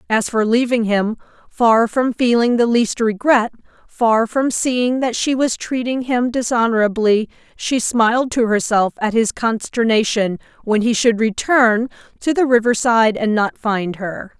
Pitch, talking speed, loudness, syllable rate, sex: 230 Hz, 155 wpm, -17 LUFS, 4.2 syllables/s, female